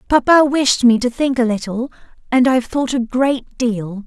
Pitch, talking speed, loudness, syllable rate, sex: 250 Hz, 175 wpm, -16 LUFS, 4.8 syllables/s, female